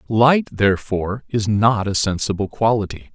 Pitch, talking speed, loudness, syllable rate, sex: 110 Hz, 135 wpm, -19 LUFS, 4.8 syllables/s, male